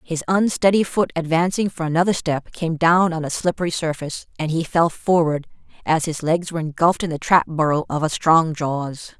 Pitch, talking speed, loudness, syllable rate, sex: 165 Hz, 195 wpm, -20 LUFS, 5.3 syllables/s, female